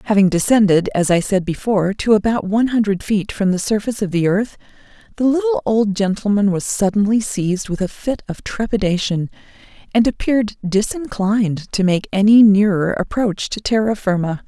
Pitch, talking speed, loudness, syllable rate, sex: 205 Hz, 165 wpm, -17 LUFS, 5.4 syllables/s, female